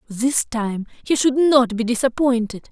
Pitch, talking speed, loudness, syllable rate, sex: 240 Hz, 155 wpm, -19 LUFS, 4.4 syllables/s, female